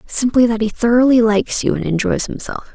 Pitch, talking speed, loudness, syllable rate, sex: 230 Hz, 195 wpm, -16 LUFS, 5.7 syllables/s, female